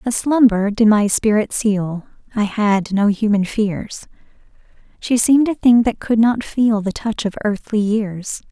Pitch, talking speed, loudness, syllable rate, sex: 215 Hz, 170 wpm, -17 LUFS, 4.0 syllables/s, female